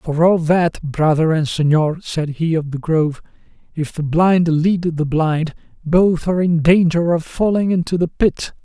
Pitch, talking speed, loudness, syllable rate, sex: 165 Hz, 180 wpm, -17 LUFS, 4.3 syllables/s, male